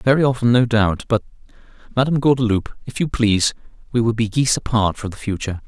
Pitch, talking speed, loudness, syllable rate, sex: 115 Hz, 190 wpm, -19 LUFS, 6.4 syllables/s, male